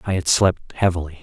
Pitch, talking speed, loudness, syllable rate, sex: 90 Hz, 195 wpm, -19 LUFS, 5.6 syllables/s, male